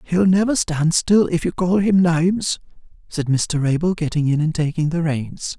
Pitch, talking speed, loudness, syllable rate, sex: 165 Hz, 195 wpm, -19 LUFS, 4.6 syllables/s, male